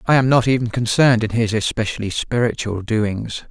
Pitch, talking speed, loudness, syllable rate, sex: 115 Hz, 170 wpm, -18 LUFS, 5.4 syllables/s, male